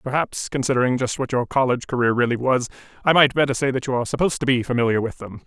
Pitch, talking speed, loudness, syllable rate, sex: 125 Hz, 240 wpm, -21 LUFS, 7.2 syllables/s, male